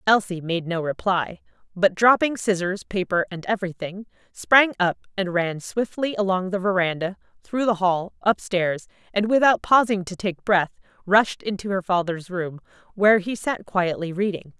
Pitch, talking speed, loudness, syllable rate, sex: 190 Hz, 155 wpm, -22 LUFS, 4.7 syllables/s, female